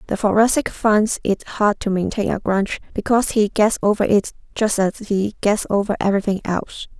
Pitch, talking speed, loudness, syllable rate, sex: 205 Hz, 180 wpm, -19 LUFS, 5.4 syllables/s, female